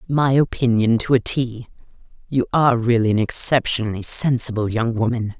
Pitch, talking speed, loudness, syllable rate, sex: 120 Hz, 145 wpm, -18 LUFS, 5.3 syllables/s, female